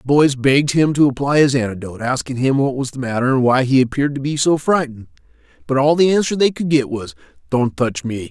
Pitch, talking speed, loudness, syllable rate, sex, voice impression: 135 Hz, 240 wpm, -17 LUFS, 6.3 syllables/s, male, masculine, middle-aged, slightly relaxed, slightly fluent, raspy, intellectual, calm, mature, slightly friendly, wild, lively, strict